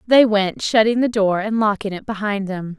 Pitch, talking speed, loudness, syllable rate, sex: 210 Hz, 215 wpm, -18 LUFS, 4.9 syllables/s, female